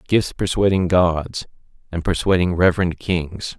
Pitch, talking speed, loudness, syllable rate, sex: 90 Hz, 115 wpm, -19 LUFS, 4.3 syllables/s, male